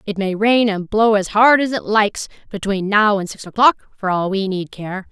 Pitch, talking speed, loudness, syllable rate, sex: 205 Hz, 235 wpm, -17 LUFS, 4.9 syllables/s, female